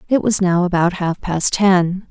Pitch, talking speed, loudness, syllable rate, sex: 185 Hz, 200 wpm, -16 LUFS, 4.2 syllables/s, female